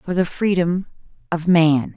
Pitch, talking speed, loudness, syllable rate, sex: 170 Hz, 155 wpm, -19 LUFS, 4.3 syllables/s, female